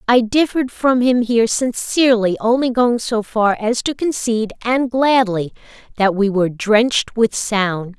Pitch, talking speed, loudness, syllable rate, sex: 230 Hz, 160 wpm, -17 LUFS, 4.6 syllables/s, female